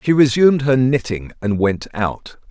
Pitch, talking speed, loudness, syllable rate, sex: 125 Hz, 170 wpm, -17 LUFS, 4.5 syllables/s, male